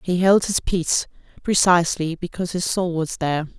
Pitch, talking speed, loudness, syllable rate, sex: 175 Hz, 170 wpm, -20 LUFS, 5.6 syllables/s, female